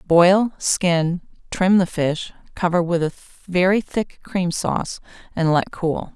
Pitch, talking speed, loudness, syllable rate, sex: 175 Hz, 135 wpm, -20 LUFS, 3.4 syllables/s, female